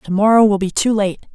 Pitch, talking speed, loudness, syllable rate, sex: 205 Hz, 265 wpm, -15 LUFS, 5.5 syllables/s, female